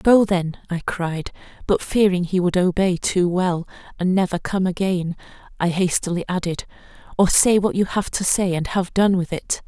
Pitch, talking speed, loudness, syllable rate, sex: 185 Hz, 180 wpm, -20 LUFS, 4.7 syllables/s, female